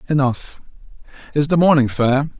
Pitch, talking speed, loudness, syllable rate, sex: 140 Hz, 100 wpm, -17 LUFS, 5.0 syllables/s, male